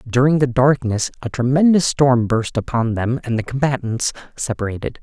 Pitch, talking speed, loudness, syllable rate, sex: 125 Hz, 155 wpm, -18 LUFS, 5.0 syllables/s, male